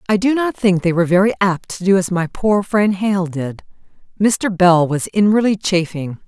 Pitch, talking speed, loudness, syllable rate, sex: 190 Hz, 200 wpm, -16 LUFS, 4.9 syllables/s, female